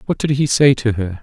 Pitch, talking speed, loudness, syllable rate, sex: 125 Hz, 295 wpm, -16 LUFS, 5.6 syllables/s, male